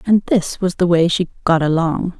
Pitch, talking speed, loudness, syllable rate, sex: 175 Hz, 220 wpm, -17 LUFS, 4.9 syllables/s, female